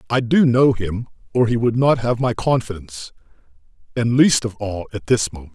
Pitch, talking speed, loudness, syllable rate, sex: 115 Hz, 195 wpm, -19 LUFS, 5.3 syllables/s, male